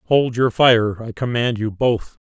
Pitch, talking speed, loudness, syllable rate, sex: 115 Hz, 160 wpm, -18 LUFS, 4.1 syllables/s, male